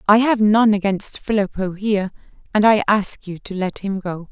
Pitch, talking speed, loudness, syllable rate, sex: 200 Hz, 195 wpm, -19 LUFS, 4.9 syllables/s, female